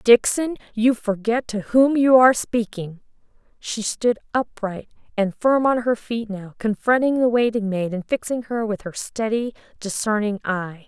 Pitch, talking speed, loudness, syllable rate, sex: 225 Hz, 160 wpm, -21 LUFS, 4.4 syllables/s, female